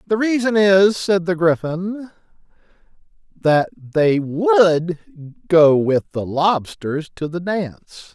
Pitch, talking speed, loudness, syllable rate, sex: 175 Hz, 120 wpm, -18 LUFS, 3.0 syllables/s, male